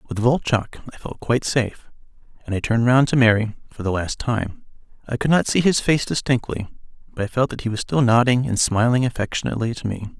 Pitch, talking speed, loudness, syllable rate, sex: 120 Hz, 210 wpm, -20 LUFS, 6.0 syllables/s, male